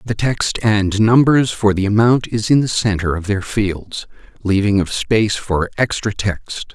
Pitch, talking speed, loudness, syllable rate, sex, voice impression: 105 Hz, 180 wpm, -17 LUFS, 4.4 syllables/s, male, very masculine, adult-like, slightly thick, cool, slightly refreshing, sincere, reassuring, slightly elegant